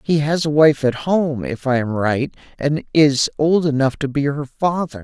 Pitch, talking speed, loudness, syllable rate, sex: 145 Hz, 215 wpm, -18 LUFS, 4.4 syllables/s, male